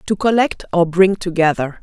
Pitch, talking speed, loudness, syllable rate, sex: 180 Hz, 165 wpm, -16 LUFS, 4.8 syllables/s, female